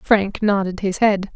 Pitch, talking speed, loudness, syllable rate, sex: 200 Hz, 175 wpm, -19 LUFS, 4.0 syllables/s, female